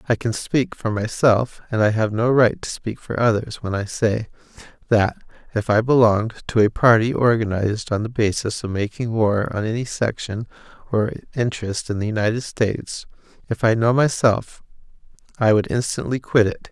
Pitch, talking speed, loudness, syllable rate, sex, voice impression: 110 Hz, 170 wpm, -20 LUFS, 5.1 syllables/s, male, masculine, adult-like, slightly tensed, slightly weak, clear, raspy, calm, friendly, reassuring, kind, modest